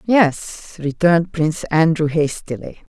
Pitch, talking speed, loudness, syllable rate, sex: 160 Hz, 100 wpm, -18 LUFS, 4.0 syllables/s, female